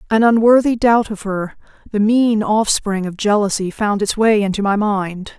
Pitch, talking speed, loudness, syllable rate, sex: 210 Hz, 155 wpm, -16 LUFS, 4.6 syllables/s, female